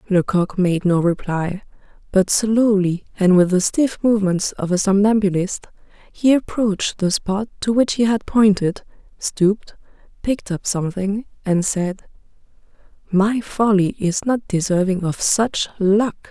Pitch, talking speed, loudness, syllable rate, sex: 200 Hz, 135 wpm, -19 LUFS, 4.4 syllables/s, female